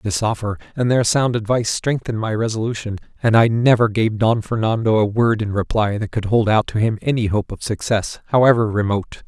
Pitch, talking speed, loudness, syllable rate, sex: 110 Hz, 200 wpm, -18 LUFS, 5.7 syllables/s, male